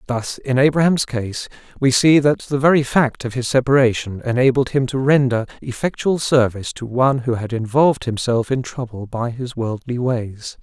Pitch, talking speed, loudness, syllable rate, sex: 125 Hz, 175 wpm, -18 LUFS, 5.1 syllables/s, male